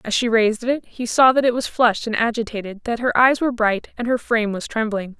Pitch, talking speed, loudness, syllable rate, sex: 230 Hz, 255 wpm, -19 LUFS, 6.1 syllables/s, female